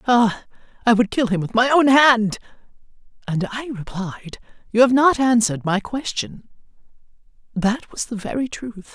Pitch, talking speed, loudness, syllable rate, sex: 230 Hz, 155 wpm, -19 LUFS, 4.7 syllables/s, female